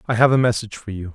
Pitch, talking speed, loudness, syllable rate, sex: 110 Hz, 315 wpm, -18 LUFS, 7.8 syllables/s, male